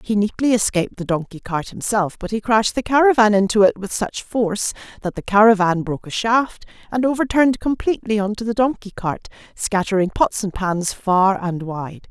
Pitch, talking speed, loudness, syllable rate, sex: 210 Hz, 190 wpm, -19 LUFS, 5.4 syllables/s, female